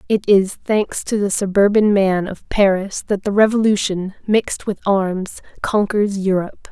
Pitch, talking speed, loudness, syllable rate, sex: 200 Hz, 150 wpm, -18 LUFS, 4.4 syllables/s, female